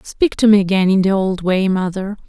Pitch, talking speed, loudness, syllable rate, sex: 195 Hz, 235 wpm, -16 LUFS, 5.2 syllables/s, female